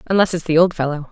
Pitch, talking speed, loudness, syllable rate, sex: 165 Hz, 270 wpm, -17 LUFS, 7.1 syllables/s, female